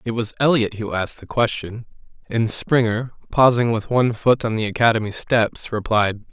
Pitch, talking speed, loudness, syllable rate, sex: 115 Hz, 170 wpm, -20 LUFS, 5.1 syllables/s, male